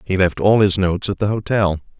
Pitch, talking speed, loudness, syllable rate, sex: 95 Hz, 240 wpm, -17 LUFS, 5.8 syllables/s, male